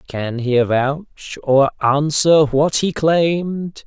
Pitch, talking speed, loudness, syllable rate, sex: 145 Hz, 125 wpm, -16 LUFS, 3.2 syllables/s, male